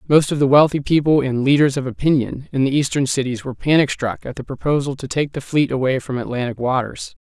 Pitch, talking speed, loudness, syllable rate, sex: 135 Hz, 225 wpm, -19 LUFS, 6.0 syllables/s, male